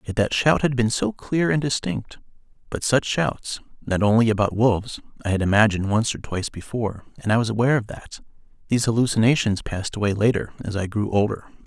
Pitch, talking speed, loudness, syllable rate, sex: 115 Hz, 195 wpm, -22 LUFS, 4.1 syllables/s, male